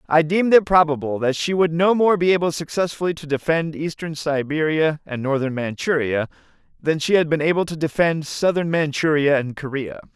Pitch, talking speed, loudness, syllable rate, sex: 155 Hz, 175 wpm, -20 LUFS, 5.4 syllables/s, male